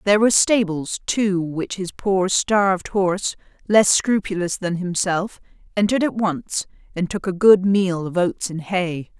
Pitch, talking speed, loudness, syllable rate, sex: 190 Hz, 165 wpm, -20 LUFS, 4.4 syllables/s, female